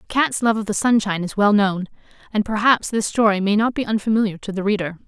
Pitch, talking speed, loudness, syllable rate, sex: 210 Hz, 235 wpm, -19 LUFS, 6.5 syllables/s, female